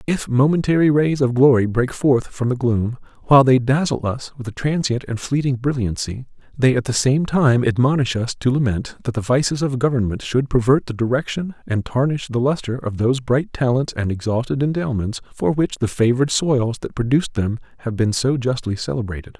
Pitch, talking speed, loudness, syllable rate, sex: 130 Hz, 190 wpm, -19 LUFS, 5.4 syllables/s, male